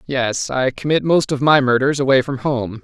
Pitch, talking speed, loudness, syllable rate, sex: 135 Hz, 210 wpm, -17 LUFS, 4.8 syllables/s, male